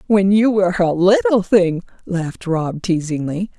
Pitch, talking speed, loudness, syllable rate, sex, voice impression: 180 Hz, 150 wpm, -17 LUFS, 4.4 syllables/s, female, feminine, adult-like, slightly muffled, intellectual, calm, elegant